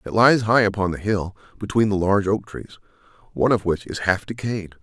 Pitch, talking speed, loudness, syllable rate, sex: 100 Hz, 210 wpm, -21 LUFS, 6.0 syllables/s, male